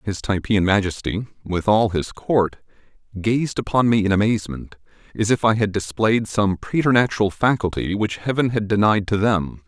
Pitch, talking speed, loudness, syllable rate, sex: 105 Hz, 160 wpm, -20 LUFS, 4.9 syllables/s, male